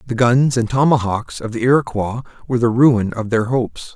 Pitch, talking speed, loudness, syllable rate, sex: 120 Hz, 195 wpm, -17 LUFS, 5.4 syllables/s, male